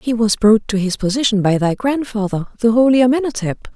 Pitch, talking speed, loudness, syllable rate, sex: 225 Hz, 190 wpm, -16 LUFS, 5.7 syllables/s, female